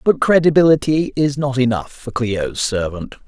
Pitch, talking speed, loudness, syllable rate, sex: 130 Hz, 145 wpm, -17 LUFS, 4.6 syllables/s, male